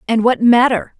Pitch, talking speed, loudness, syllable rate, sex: 235 Hz, 180 wpm, -13 LUFS, 4.8 syllables/s, female